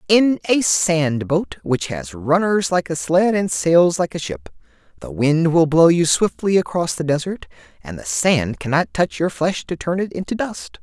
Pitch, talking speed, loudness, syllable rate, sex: 160 Hz, 200 wpm, -18 LUFS, 4.3 syllables/s, male